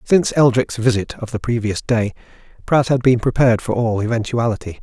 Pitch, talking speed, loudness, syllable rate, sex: 120 Hz, 175 wpm, -18 LUFS, 5.8 syllables/s, male